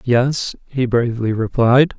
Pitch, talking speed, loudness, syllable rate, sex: 125 Hz, 120 wpm, -17 LUFS, 4.0 syllables/s, male